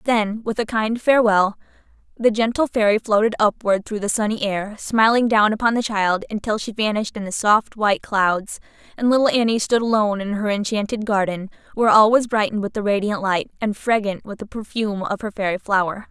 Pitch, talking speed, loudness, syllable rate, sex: 210 Hz, 195 wpm, -20 LUFS, 5.6 syllables/s, female